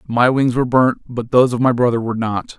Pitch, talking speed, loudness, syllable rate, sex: 120 Hz, 255 wpm, -16 LUFS, 6.3 syllables/s, male